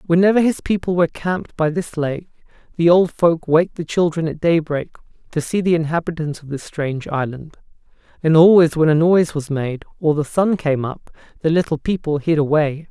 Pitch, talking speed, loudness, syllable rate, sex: 160 Hz, 190 wpm, -18 LUFS, 5.5 syllables/s, male